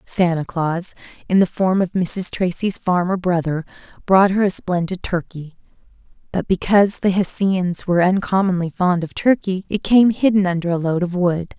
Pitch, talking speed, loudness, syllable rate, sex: 180 Hz, 165 wpm, -18 LUFS, 4.8 syllables/s, female